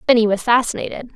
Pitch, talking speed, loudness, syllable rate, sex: 230 Hz, 155 wpm, -17 LUFS, 7.1 syllables/s, female